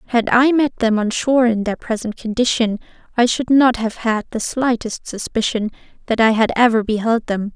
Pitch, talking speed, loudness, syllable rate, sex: 230 Hz, 190 wpm, -18 LUFS, 5.2 syllables/s, female